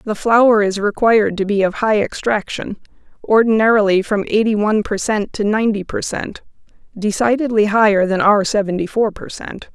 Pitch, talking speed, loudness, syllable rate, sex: 210 Hz, 160 wpm, -16 LUFS, 5.2 syllables/s, female